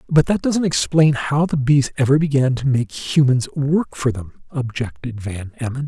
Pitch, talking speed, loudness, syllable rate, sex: 135 Hz, 185 wpm, -19 LUFS, 4.6 syllables/s, male